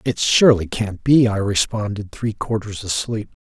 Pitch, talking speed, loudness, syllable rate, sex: 105 Hz, 160 wpm, -19 LUFS, 4.7 syllables/s, male